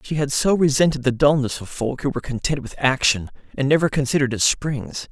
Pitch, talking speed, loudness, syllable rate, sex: 135 Hz, 210 wpm, -20 LUFS, 6.0 syllables/s, male